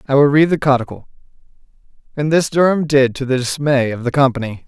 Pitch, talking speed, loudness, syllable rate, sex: 140 Hz, 190 wpm, -16 LUFS, 6.1 syllables/s, male